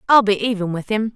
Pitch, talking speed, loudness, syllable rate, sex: 210 Hz, 260 wpm, -19 LUFS, 6.2 syllables/s, female